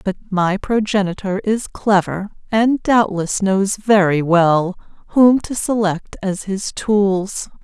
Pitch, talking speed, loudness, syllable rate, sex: 200 Hz, 125 wpm, -17 LUFS, 3.5 syllables/s, female